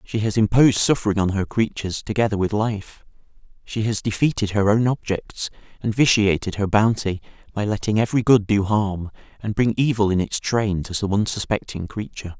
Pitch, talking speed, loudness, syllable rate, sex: 105 Hz, 175 wpm, -21 LUFS, 5.5 syllables/s, male